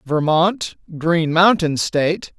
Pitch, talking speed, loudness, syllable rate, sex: 165 Hz, 100 wpm, -17 LUFS, 3.3 syllables/s, male